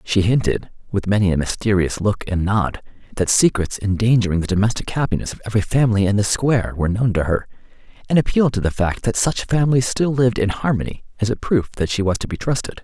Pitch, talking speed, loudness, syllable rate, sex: 110 Hz, 215 wpm, -19 LUFS, 6.4 syllables/s, male